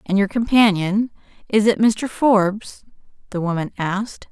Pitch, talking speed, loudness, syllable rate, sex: 205 Hz, 125 wpm, -19 LUFS, 4.6 syllables/s, female